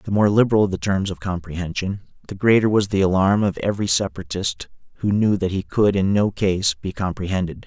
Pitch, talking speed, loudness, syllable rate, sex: 100 Hz, 195 wpm, -20 LUFS, 5.7 syllables/s, male